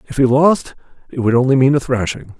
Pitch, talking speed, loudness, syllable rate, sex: 130 Hz, 225 wpm, -15 LUFS, 5.9 syllables/s, male